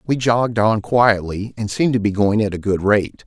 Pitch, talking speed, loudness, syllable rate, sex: 110 Hz, 220 wpm, -18 LUFS, 5.2 syllables/s, male